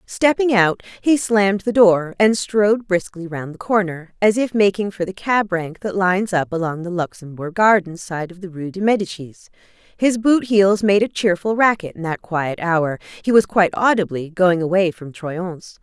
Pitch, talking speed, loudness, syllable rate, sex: 190 Hz, 195 wpm, -18 LUFS, 4.8 syllables/s, female